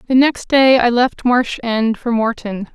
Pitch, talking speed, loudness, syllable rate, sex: 240 Hz, 195 wpm, -15 LUFS, 4.0 syllables/s, female